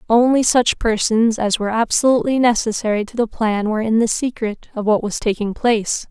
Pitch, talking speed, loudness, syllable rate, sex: 225 Hz, 185 wpm, -18 LUFS, 5.6 syllables/s, female